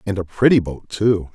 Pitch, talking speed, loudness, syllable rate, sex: 100 Hz, 225 wpm, -18 LUFS, 5.0 syllables/s, male